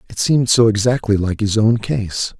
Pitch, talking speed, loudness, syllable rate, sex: 110 Hz, 200 wpm, -16 LUFS, 5.1 syllables/s, male